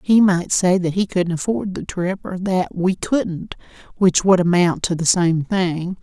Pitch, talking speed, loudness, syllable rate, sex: 180 Hz, 200 wpm, -19 LUFS, 4.0 syllables/s, female